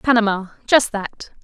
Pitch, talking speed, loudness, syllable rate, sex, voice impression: 220 Hz, 125 wpm, -18 LUFS, 4.6 syllables/s, female, very feminine, young, slightly adult-like, very thin, slightly tensed, slightly powerful, bright, hard, very clear, fluent, very cute, intellectual, very refreshing, sincere, calm, very friendly, very reassuring, unique, elegant, slightly wild, sweet, very lively, slightly strict, intense, slightly sharp, modest, light